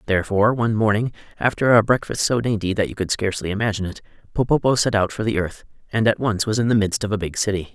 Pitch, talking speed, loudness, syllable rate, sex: 105 Hz, 240 wpm, -21 LUFS, 7.0 syllables/s, male